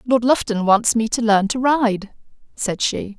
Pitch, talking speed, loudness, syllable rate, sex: 225 Hz, 190 wpm, -18 LUFS, 4.1 syllables/s, female